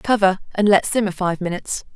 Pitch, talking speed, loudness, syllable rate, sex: 195 Hz, 185 wpm, -19 LUFS, 5.9 syllables/s, female